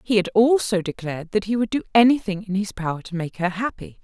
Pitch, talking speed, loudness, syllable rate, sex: 200 Hz, 240 wpm, -22 LUFS, 6.1 syllables/s, female